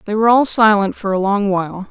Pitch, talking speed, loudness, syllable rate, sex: 205 Hz, 250 wpm, -15 LUFS, 6.2 syllables/s, female